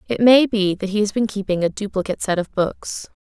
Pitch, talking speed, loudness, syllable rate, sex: 205 Hz, 240 wpm, -19 LUFS, 5.7 syllables/s, female